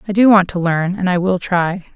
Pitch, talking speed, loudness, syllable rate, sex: 185 Hz, 275 wpm, -15 LUFS, 5.0 syllables/s, female